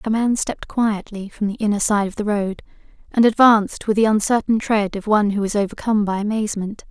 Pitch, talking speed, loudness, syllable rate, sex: 210 Hz, 210 wpm, -19 LUFS, 6.0 syllables/s, female